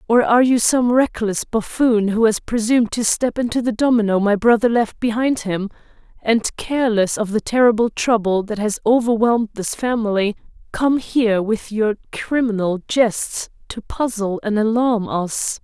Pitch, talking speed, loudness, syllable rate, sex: 225 Hz, 155 wpm, -18 LUFS, 4.7 syllables/s, female